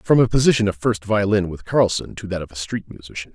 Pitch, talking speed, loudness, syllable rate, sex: 100 Hz, 250 wpm, -20 LUFS, 6.0 syllables/s, male